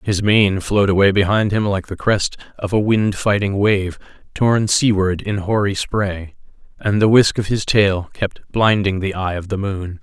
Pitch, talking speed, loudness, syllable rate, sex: 100 Hz, 190 wpm, -17 LUFS, 4.4 syllables/s, male